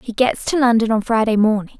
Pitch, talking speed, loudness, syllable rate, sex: 225 Hz, 235 wpm, -17 LUFS, 5.9 syllables/s, female